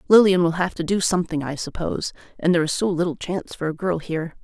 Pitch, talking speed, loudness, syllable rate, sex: 170 Hz, 245 wpm, -22 LUFS, 6.8 syllables/s, female